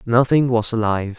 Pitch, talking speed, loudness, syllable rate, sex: 115 Hz, 150 wpm, -18 LUFS, 5.5 syllables/s, male